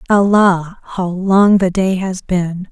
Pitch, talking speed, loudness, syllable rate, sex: 185 Hz, 155 wpm, -14 LUFS, 3.4 syllables/s, female